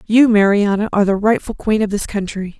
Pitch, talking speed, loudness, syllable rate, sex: 205 Hz, 210 wpm, -16 LUFS, 5.8 syllables/s, female